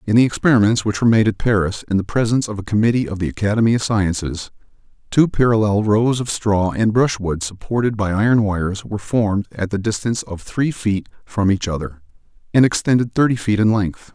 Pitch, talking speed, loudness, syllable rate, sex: 105 Hz, 200 wpm, -18 LUFS, 5.9 syllables/s, male